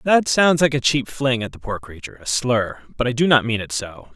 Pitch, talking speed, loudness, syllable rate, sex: 125 Hz, 275 wpm, -20 LUFS, 5.4 syllables/s, male